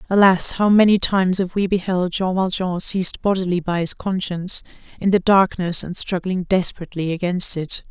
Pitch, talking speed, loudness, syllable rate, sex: 185 Hz, 165 wpm, -19 LUFS, 5.3 syllables/s, female